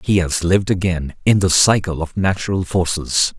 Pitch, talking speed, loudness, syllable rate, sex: 90 Hz, 175 wpm, -17 LUFS, 5.0 syllables/s, male